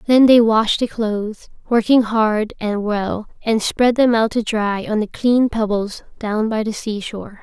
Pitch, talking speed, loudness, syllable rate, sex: 220 Hz, 185 wpm, -18 LUFS, 4.2 syllables/s, female